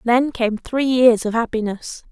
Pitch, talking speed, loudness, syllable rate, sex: 235 Hz, 170 wpm, -18 LUFS, 4.1 syllables/s, female